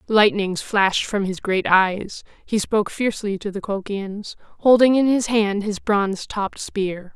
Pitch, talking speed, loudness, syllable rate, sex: 205 Hz, 170 wpm, -20 LUFS, 4.4 syllables/s, female